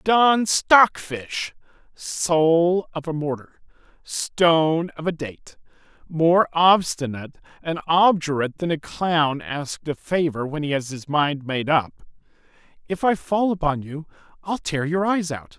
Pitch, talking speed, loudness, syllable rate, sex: 160 Hz, 140 wpm, -21 LUFS, 3.9 syllables/s, male